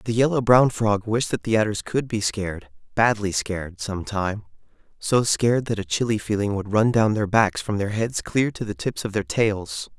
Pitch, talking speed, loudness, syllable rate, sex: 105 Hz, 215 wpm, -22 LUFS, 4.9 syllables/s, male